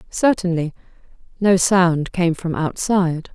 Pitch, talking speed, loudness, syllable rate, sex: 175 Hz, 110 wpm, -19 LUFS, 4.0 syllables/s, female